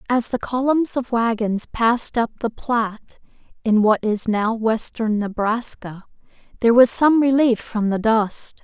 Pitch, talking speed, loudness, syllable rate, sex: 230 Hz, 155 wpm, -19 LUFS, 4.4 syllables/s, female